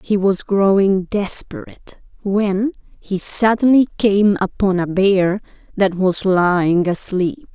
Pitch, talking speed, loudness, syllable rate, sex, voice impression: 195 Hz, 120 wpm, -17 LUFS, 3.7 syllables/s, female, feminine, adult-like, slightly powerful, clear, slightly refreshing, friendly, lively